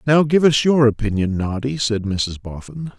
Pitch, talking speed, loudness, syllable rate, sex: 120 Hz, 180 wpm, -18 LUFS, 4.7 syllables/s, male